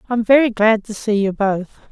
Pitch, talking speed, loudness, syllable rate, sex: 215 Hz, 220 wpm, -17 LUFS, 5.1 syllables/s, female